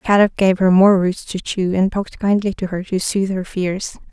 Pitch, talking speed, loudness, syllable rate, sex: 190 Hz, 235 wpm, -17 LUFS, 5.1 syllables/s, female